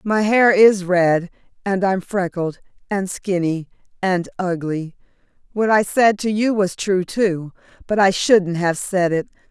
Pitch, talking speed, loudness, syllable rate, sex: 190 Hz, 160 wpm, -19 LUFS, 3.9 syllables/s, female